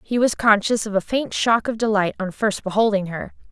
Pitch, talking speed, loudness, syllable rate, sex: 215 Hz, 220 wpm, -20 LUFS, 5.3 syllables/s, female